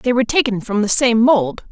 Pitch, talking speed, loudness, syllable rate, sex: 225 Hz, 245 wpm, -15 LUFS, 5.4 syllables/s, female